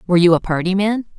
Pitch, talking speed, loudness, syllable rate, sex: 185 Hz, 255 wpm, -16 LUFS, 7.5 syllables/s, female